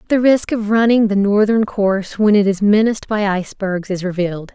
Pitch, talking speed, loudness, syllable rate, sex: 205 Hz, 200 wpm, -16 LUFS, 5.6 syllables/s, female